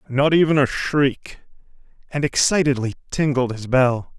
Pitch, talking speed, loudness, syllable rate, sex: 135 Hz, 130 wpm, -19 LUFS, 4.5 syllables/s, male